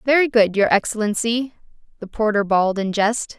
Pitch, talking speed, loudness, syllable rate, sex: 220 Hz, 160 wpm, -19 LUFS, 5.3 syllables/s, female